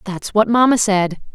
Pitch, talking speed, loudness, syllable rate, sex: 210 Hz, 180 wpm, -16 LUFS, 4.6 syllables/s, female